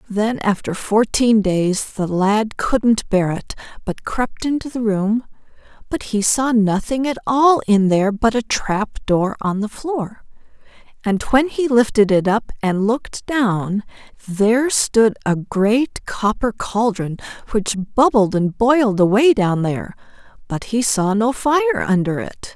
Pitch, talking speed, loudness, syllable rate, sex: 220 Hz, 155 wpm, -18 LUFS, 3.9 syllables/s, female